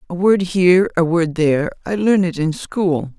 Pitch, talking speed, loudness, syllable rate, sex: 175 Hz, 205 wpm, -17 LUFS, 4.7 syllables/s, female